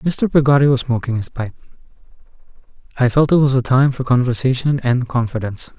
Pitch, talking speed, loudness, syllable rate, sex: 130 Hz, 165 wpm, -17 LUFS, 5.9 syllables/s, male